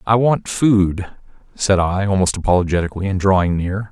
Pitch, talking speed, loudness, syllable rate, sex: 95 Hz, 155 wpm, -17 LUFS, 5.3 syllables/s, male